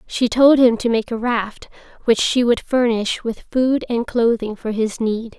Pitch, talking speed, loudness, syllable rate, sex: 235 Hz, 200 wpm, -18 LUFS, 4.2 syllables/s, female